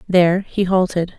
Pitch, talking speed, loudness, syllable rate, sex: 180 Hz, 150 wpm, -17 LUFS, 4.9 syllables/s, female